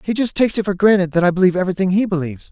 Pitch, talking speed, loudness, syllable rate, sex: 190 Hz, 285 wpm, -17 LUFS, 8.7 syllables/s, male